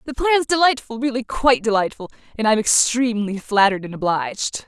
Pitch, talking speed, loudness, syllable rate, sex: 230 Hz, 140 wpm, -19 LUFS, 5.9 syllables/s, female